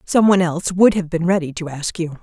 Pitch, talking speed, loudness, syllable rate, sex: 175 Hz, 270 wpm, -18 LUFS, 6.1 syllables/s, female